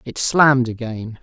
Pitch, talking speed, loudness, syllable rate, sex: 125 Hz, 145 wpm, -17 LUFS, 4.4 syllables/s, male